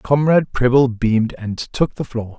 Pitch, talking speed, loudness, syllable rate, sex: 125 Hz, 175 wpm, -18 LUFS, 4.8 syllables/s, male